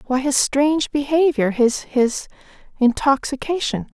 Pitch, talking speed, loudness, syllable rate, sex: 270 Hz, 75 wpm, -19 LUFS, 4.3 syllables/s, female